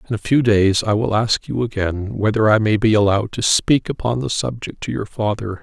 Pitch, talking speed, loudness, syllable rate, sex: 110 Hz, 235 wpm, -18 LUFS, 5.3 syllables/s, male